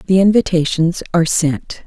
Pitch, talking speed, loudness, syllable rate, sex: 175 Hz, 130 wpm, -15 LUFS, 5.0 syllables/s, female